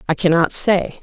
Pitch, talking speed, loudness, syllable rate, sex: 175 Hz, 175 wpm, -16 LUFS, 4.8 syllables/s, female